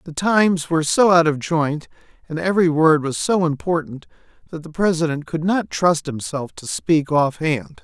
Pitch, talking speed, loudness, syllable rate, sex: 160 Hz, 185 wpm, -19 LUFS, 4.8 syllables/s, male